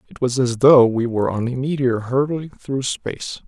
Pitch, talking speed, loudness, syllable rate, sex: 130 Hz, 205 wpm, -19 LUFS, 4.9 syllables/s, male